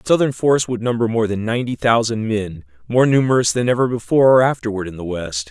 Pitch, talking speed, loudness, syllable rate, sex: 115 Hz, 220 wpm, -17 LUFS, 6.4 syllables/s, male